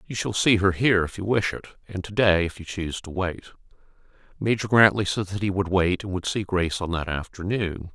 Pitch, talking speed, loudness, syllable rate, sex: 95 Hz, 225 wpm, -24 LUFS, 5.8 syllables/s, male